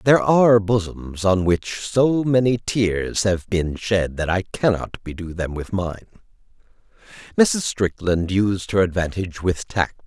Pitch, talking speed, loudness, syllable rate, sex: 100 Hz, 150 wpm, -21 LUFS, 4.1 syllables/s, male